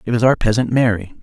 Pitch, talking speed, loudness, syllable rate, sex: 115 Hz, 245 wpm, -16 LUFS, 6.3 syllables/s, male